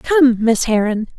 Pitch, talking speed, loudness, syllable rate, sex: 240 Hz, 150 wpm, -15 LUFS, 3.8 syllables/s, female